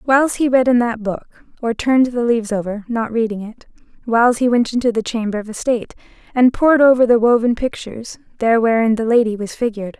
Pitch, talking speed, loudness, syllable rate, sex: 235 Hz, 205 wpm, -16 LUFS, 6.2 syllables/s, female